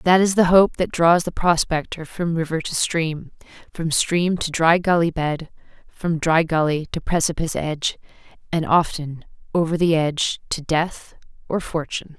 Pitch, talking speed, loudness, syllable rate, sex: 165 Hz, 160 wpm, -20 LUFS, 4.6 syllables/s, female